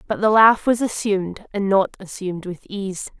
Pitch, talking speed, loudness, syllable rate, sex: 200 Hz, 190 wpm, -20 LUFS, 5.0 syllables/s, female